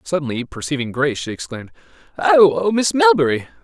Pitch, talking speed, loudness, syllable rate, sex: 130 Hz, 130 wpm, -17 LUFS, 5.9 syllables/s, male